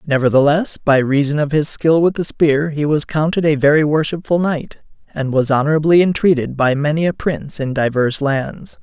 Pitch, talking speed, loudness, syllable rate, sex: 150 Hz, 185 wpm, -16 LUFS, 5.2 syllables/s, male